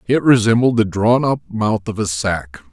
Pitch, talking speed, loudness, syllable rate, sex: 110 Hz, 200 wpm, -16 LUFS, 4.5 syllables/s, male